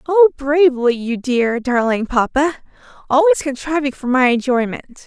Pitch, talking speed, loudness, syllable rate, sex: 270 Hz, 130 wpm, -16 LUFS, 4.7 syllables/s, female